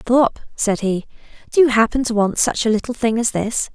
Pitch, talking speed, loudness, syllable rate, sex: 230 Hz, 225 wpm, -18 LUFS, 5.6 syllables/s, female